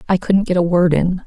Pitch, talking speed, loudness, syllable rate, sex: 180 Hz, 285 wpm, -16 LUFS, 5.5 syllables/s, female